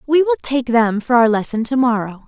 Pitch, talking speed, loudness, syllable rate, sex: 235 Hz, 240 wpm, -16 LUFS, 5.3 syllables/s, female